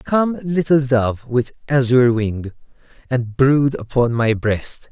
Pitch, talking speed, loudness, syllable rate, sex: 130 Hz, 135 wpm, -18 LUFS, 3.7 syllables/s, male